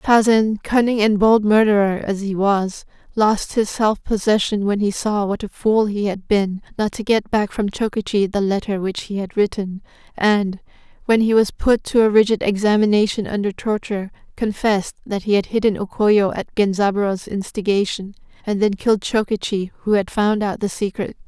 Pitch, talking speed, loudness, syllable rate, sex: 205 Hz, 180 wpm, -19 LUFS, 5.0 syllables/s, female